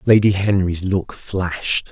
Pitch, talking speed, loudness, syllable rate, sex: 95 Hz, 125 wpm, -19 LUFS, 4.0 syllables/s, male